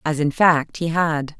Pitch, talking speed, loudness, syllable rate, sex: 155 Hz, 215 wpm, -19 LUFS, 4.0 syllables/s, female